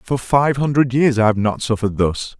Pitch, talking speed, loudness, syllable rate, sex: 120 Hz, 225 wpm, -17 LUFS, 5.1 syllables/s, male